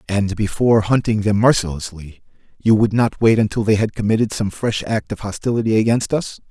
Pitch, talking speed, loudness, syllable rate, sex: 110 Hz, 185 wpm, -18 LUFS, 5.6 syllables/s, male